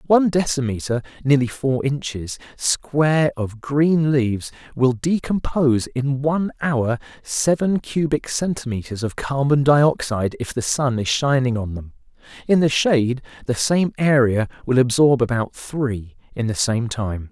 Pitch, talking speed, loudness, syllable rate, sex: 135 Hz, 140 wpm, -20 LUFS, 4.3 syllables/s, male